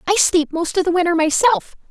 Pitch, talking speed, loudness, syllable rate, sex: 335 Hz, 220 wpm, -17 LUFS, 5.6 syllables/s, female